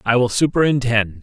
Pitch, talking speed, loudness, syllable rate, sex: 120 Hz, 145 wpm, -17 LUFS, 5.3 syllables/s, male